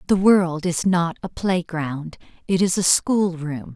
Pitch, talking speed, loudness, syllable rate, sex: 175 Hz, 160 wpm, -20 LUFS, 3.7 syllables/s, female